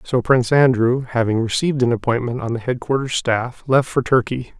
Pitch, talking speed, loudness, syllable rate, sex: 125 Hz, 185 wpm, -18 LUFS, 5.4 syllables/s, male